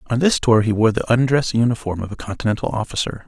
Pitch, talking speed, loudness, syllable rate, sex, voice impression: 115 Hz, 220 wpm, -19 LUFS, 6.5 syllables/s, male, very masculine, adult-like, slightly thick, cool, sincere, slightly calm